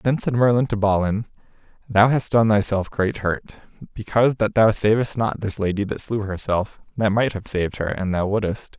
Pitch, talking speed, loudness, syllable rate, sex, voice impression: 105 Hz, 200 wpm, -21 LUFS, 5.2 syllables/s, male, very masculine, very adult-like, middle-aged, very thick, slightly tensed, slightly weak, slightly dark, slightly soft, muffled, fluent, cool, very intellectual, very sincere, very calm, mature, friendly, reassuring, elegant, sweet, kind, very modest